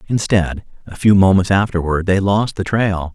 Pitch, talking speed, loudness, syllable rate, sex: 95 Hz, 170 wpm, -16 LUFS, 4.7 syllables/s, male